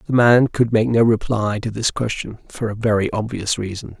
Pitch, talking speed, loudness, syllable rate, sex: 110 Hz, 210 wpm, -19 LUFS, 5.1 syllables/s, male